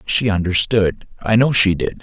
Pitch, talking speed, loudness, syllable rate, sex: 100 Hz, 180 wpm, -16 LUFS, 4.6 syllables/s, male